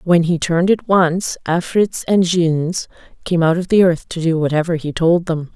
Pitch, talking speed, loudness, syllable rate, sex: 170 Hz, 205 wpm, -16 LUFS, 4.5 syllables/s, female